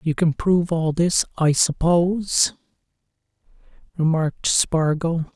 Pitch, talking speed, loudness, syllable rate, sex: 165 Hz, 100 wpm, -20 LUFS, 4.1 syllables/s, male